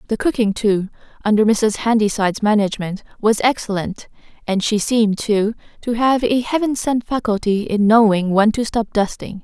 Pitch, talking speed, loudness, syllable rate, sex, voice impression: 215 Hz, 160 wpm, -18 LUFS, 5.1 syllables/s, female, very feminine, slightly young, slightly adult-like, thin, slightly tensed, slightly weak, slightly dark, hard, clear, fluent, cute, intellectual, slightly refreshing, sincere, slightly calm, friendly, reassuring, elegant, slightly sweet, slightly strict